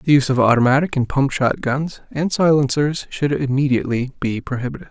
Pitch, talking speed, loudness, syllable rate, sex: 135 Hz, 160 wpm, -19 LUFS, 5.8 syllables/s, male